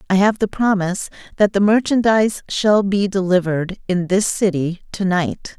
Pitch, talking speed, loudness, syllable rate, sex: 195 Hz, 160 wpm, -18 LUFS, 5.0 syllables/s, female